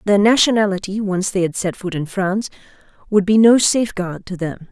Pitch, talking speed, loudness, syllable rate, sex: 195 Hz, 190 wpm, -17 LUFS, 5.5 syllables/s, female